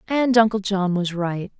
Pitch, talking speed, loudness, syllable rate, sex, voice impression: 200 Hz, 190 wpm, -20 LUFS, 4.3 syllables/s, female, feminine, adult-like, tensed, slightly powerful, clear, fluent, intellectual, calm, friendly, elegant, lively, slightly sharp